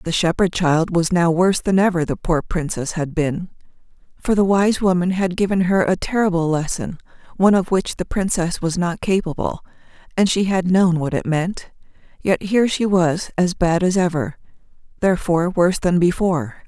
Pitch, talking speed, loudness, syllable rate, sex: 180 Hz, 180 wpm, -19 LUFS, 5.2 syllables/s, female